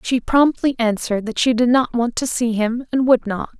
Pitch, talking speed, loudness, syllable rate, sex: 240 Hz, 235 wpm, -18 LUFS, 5.1 syllables/s, female